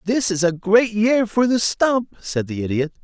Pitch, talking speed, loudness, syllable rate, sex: 200 Hz, 220 wpm, -19 LUFS, 4.5 syllables/s, male